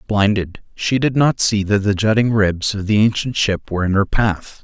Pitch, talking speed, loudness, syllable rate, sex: 105 Hz, 220 wpm, -17 LUFS, 4.8 syllables/s, male